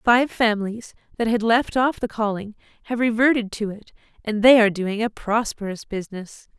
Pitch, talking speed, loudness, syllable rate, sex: 220 Hz, 175 wpm, -21 LUFS, 5.3 syllables/s, female